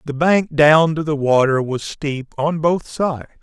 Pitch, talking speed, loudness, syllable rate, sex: 150 Hz, 195 wpm, -17 LUFS, 4.3 syllables/s, male